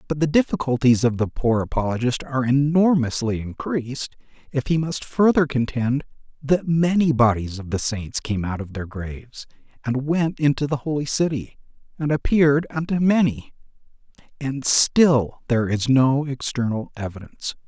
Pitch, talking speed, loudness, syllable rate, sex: 135 Hz, 145 wpm, -21 LUFS, 4.9 syllables/s, male